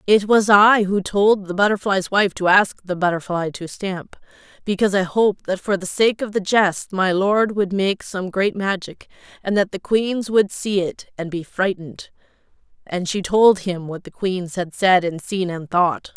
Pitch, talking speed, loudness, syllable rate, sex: 190 Hz, 200 wpm, -19 LUFS, 4.4 syllables/s, female